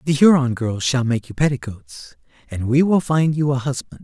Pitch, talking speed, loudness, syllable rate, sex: 130 Hz, 210 wpm, -19 LUFS, 5.0 syllables/s, male